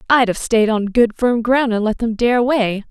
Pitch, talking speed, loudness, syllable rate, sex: 230 Hz, 250 wpm, -16 LUFS, 4.9 syllables/s, female